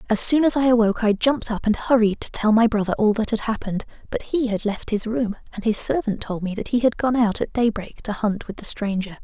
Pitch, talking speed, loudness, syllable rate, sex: 220 Hz, 265 wpm, -21 LUFS, 6.0 syllables/s, female